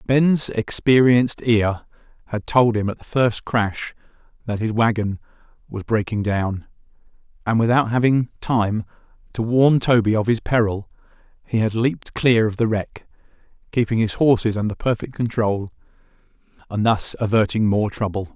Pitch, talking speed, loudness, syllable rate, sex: 110 Hz, 145 wpm, -20 LUFS, 4.7 syllables/s, male